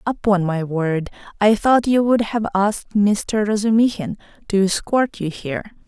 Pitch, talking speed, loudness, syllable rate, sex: 205 Hz, 155 wpm, -19 LUFS, 4.7 syllables/s, female